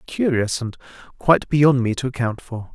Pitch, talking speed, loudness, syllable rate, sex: 130 Hz, 175 wpm, -20 LUFS, 5.1 syllables/s, male